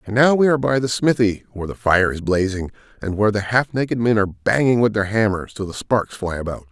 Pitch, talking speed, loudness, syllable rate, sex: 110 Hz, 250 wpm, -19 LUFS, 6.2 syllables/s, male